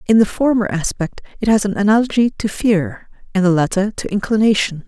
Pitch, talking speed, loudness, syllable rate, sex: 205 Hz, 185 wpm, -17 LUFS, 5.5 syllables/s, female